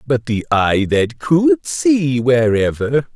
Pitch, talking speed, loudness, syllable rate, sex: 135 Hz, 135 wpm, -16 LUFS, 3.1 syllables/s, male